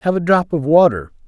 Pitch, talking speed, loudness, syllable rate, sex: 155 Hz, 235 wpm, -15 LUFS, 5.7 syllables/s, male